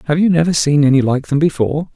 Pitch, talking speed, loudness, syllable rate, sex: 150 Hz, 245 wpm, -14 LUFS, 6.9 syllables/s, male